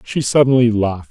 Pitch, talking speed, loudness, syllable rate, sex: 115 Hz, 165 wpm, -15 LUFS, 5.9 syllables/s, male